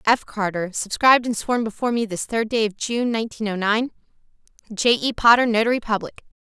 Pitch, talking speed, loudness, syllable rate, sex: 220 Hz, 185 wpm, -21 LUFS, 5.8 syllables/s, female